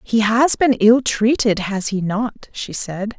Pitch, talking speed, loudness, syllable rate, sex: 220 Hz, 190 wpm, -17 LUFS, 3.6 syllables/s, female